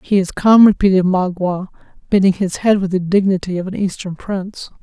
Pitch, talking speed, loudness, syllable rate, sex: 190 Hz, 185 wpm, -16 LUFS, 5.4 syllables/s, female